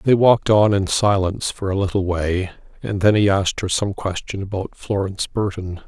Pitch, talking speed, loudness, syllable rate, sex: 100 Hz, 195 wpm, -20 LUFS, 5.3 syllables/s, male